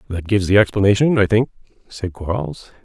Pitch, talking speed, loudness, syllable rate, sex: 100 Hz, 170 wpm, -17 LUFS, 5.9 syllables/s, male